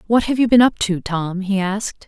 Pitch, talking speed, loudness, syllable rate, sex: 205 Hz, 260 wpm, -18 LUFS, 5.2 syllables/s, female